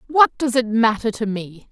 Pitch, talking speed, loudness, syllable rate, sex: 230 Hz, 210 wpm, -19 LUFS, 4.5 syllables/s, female